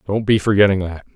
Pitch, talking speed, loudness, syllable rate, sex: 100 Hz, 205 wpm, -16 LUFS, 6.2 syllables/s, male